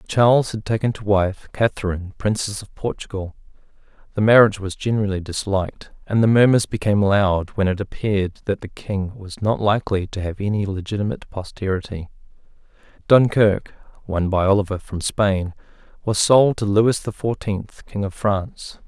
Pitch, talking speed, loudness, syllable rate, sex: 100 Hz, 155 wpm, -20 LUFS, 5.3 syllables/s, male